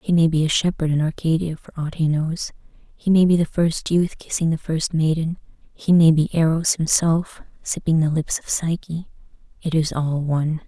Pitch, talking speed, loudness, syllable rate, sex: 160 Hz, 190 wpm, -20 LUFS, 4.8 syllables/s, female